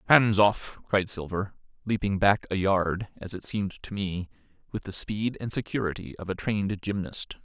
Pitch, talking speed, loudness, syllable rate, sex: 100 Hz, 175 wpm, -28 LUFS, 4.9 syllables/s, male